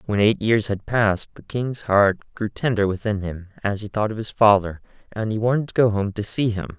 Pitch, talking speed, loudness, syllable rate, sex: 105 Hz, 240 wpm, -22 LUFS, 5.2 syllables/s, male